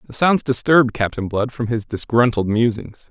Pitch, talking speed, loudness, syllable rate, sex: 115 Hz, 175 wpm, -18 LUFS, 5.1 syllables/s, male